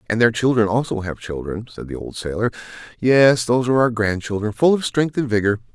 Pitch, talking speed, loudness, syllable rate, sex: 115 Hz, 220 wpm, -19 LUFS, 5.9 syllables/s, male